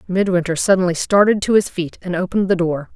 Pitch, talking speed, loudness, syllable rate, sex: 180 Hz, 205 wpm, -17 LUFS, 6.2 syllables/s, female